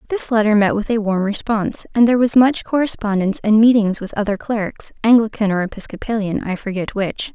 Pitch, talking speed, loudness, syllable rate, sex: 215 Hz, 190 wpm, -17 LUFS, 5.9 syllables/s, female